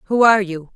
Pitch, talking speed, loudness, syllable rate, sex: 200 Hz, 240 wpm, -15 LUFS, 7.3 syllables/s, female